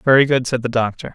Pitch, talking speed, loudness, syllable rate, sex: 125 Hz, 260 wpm, -17 LUFS, 6.3 syllables/s, male